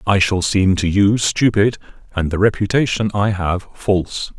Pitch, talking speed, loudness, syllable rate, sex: 100 Hz, 165 wpm, -17 LUFS, 4.4 syllables/s, male